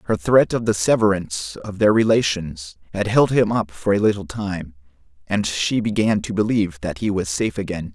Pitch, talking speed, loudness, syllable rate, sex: 100 Hz, 195 wpm, -20 LUFS, 5.2 syllables/s, male